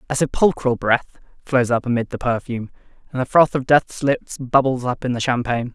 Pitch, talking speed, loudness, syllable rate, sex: 125 Hz, 200 wpm, -20 LUFS, 5.6 syllables/s, male